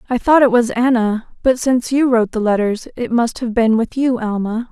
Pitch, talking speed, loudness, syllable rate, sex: 235 Hz, 230 wpm, -16 LUFS, 5.3 syllables/s, female